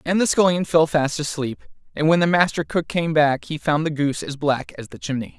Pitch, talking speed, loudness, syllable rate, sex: 155 Hz, 245 wpm, -20 LUFS, 5.4 syllables/s, male